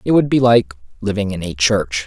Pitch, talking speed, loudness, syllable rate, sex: 105 Hz, 235 wpm, -16 LUFS, 5.3 syllables/s, male